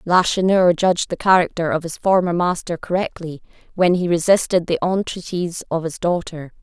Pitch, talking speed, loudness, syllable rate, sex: 175 Hz, 155 wpm, -19 LUFS, 5.2 syllables/s, female